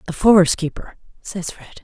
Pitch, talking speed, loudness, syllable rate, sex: 175 Hz, 165 wpm, -17 LUFS, 5.3 syllables/s, female